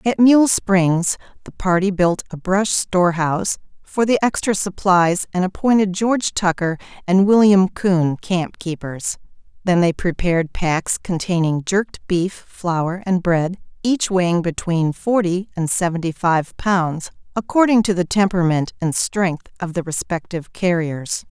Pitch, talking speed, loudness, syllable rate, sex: 180 Hz, 145 wpm, -19 LUFS, 4.3 syllables/s, female